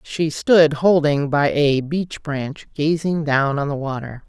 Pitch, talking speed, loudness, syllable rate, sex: 150 Hz, 170 wpm, -19 LUFS, 3.7 syllables/s, female